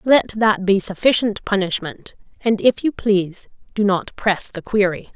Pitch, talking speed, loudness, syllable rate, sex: 205 Hz, 165 wpm, -19 LUFS, 4.5 syllables/s, female